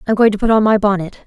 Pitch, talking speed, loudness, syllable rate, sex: 210 Hz, 380 wpm, -14 LUFS, 8.0 syllables/s, female